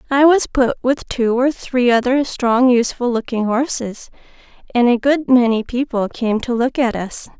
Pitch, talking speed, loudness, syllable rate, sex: 245 Hz, 180 wpm, -17 LUFS, 4.6 syllables/s, female